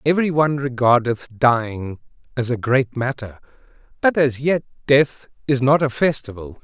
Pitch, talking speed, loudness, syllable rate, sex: 130 Hz, 145 wpm, -19 LUFS, 4.9 syllables/s, male